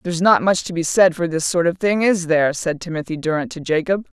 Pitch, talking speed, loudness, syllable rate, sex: 170 Hz, 260 wpm, -18 LUFS, 6.0 syllables/s, female